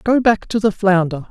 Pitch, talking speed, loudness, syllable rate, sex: 200 Hz, 230 wpm, -16 LUFS, 5.0 syllables/s, male